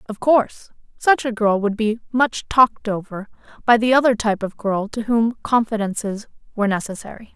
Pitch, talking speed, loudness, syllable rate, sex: 220 Hz, 170 wpm, -19 LUFS, 5.3 syllables/s, female